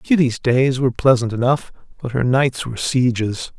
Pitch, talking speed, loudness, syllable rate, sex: 125 Hz, 165 wpm, -18 LUFS, 5.0 syllables/s, male